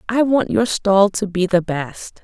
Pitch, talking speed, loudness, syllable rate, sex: 200 Hz, 215 wpm, -17 LUFS, 3.9 syllables/s, female